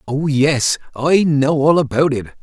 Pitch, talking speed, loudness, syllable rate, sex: 140 Hz, 175 wpm, -16 LUFS, 4.0 syllables/s, male